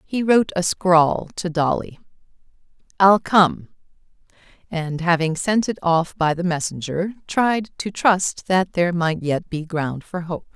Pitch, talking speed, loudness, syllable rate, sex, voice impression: 175 Hz, 150 wpm, -20 LUFS, 4.1 syllables/s, female, feminine, slightly gender-neutral, adult-like, slightly middle-aged, slightly thin, slightly tensed, slightly weak, bright, slightly hard, clear, fluent, cool, intellectual, slightly refreshing, sincere, calm, friendly, reassuring, elegant, sweet, slightly lively, kind, slightly modest